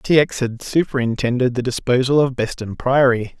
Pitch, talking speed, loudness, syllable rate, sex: 125 Hz, 160 wpm, -18 LUFS, 5.1 syllables/s, male